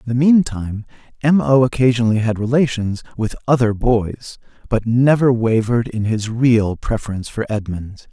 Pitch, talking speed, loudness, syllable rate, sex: 115 Hz, 150 wpm, -17 LUFS, 5.0 syllables/s, male